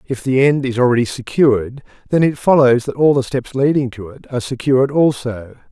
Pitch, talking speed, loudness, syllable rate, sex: 130 Hz, 200 wpm, -16 LUFS, 5.6 syllables/s, male